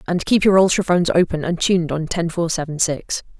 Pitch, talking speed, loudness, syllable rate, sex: 170 Hz, 210 wpm, -18 LUFS, 5.8 syllables/s, female